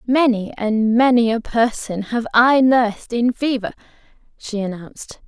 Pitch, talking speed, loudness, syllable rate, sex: 230 Hz, 135 wpm, -18 LUFS, 4.4 syllables/s, female